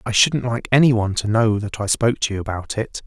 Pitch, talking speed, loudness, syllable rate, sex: 110 Hz, 255 wpm, -19 LUFS, 5.8 syllables/s, male